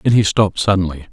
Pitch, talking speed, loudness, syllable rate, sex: 95 Hz, 215 wpm, -16 LUFS, 7.6 syllables/s, male